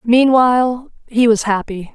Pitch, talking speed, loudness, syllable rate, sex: 235 Hz, 125 wpm, -14 LUFS, 4.1 syllables/s, female